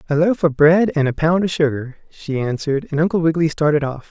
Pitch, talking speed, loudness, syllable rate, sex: 155 Hz, 235 wpm, -17 LUFS, 6.1 syllables/s, male